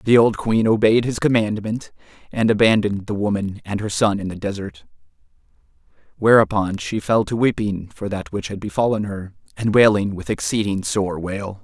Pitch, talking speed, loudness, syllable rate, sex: 105 Hz, 170 wpm, -20 LUFS, 5.1 syllables/s, male